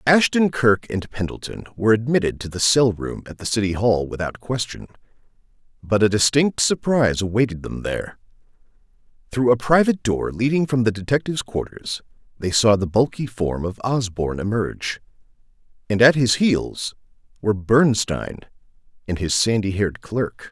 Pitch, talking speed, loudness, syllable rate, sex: 115 Hz, 150 wpm, -21 LUFS, 5.3 syllables/s, male